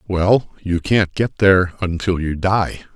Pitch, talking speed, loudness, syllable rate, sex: 95 Hz, 160 wpm, -18 LUFS, 4.1 syllables/s, male